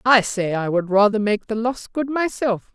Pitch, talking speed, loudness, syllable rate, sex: 220 Hz, 220 wpm, -20 LUFS, 4.5 syllables/s, female